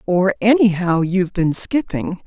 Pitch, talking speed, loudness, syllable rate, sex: 200 Hz, 130 wpm, -17 LUFS, 4.4 syllables/s, female